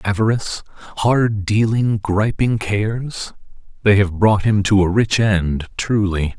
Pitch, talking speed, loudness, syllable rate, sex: 105 Hz, 130 wpm, -18 LUFS, 3.9 syllables/s, male